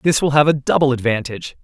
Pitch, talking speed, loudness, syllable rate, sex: 135 Hz, 220 wpm, -16 LUFS, 6.7 syllables/s, male